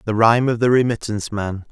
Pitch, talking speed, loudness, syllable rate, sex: 110 Hz, 210 wpm, -18 LUFS, 6.5 syllables/s, male